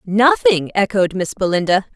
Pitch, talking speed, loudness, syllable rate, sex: 205 Hz, 125 wpm, -16 LUFS, 4.6 syllables/s, female